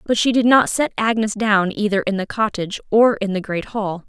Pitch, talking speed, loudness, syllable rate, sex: 210 Hz, 235 wpm, -18 LUFS, 5.3 syllables/s, female